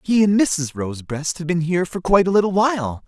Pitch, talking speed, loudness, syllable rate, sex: 175 Hz, 235 wpm, -19 LUFS, 6.1 syllables/s, male